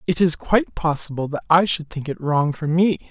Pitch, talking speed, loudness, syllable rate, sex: 160 Hz, 230 wpm, -20 LUFS, 5.4 syllables/s, male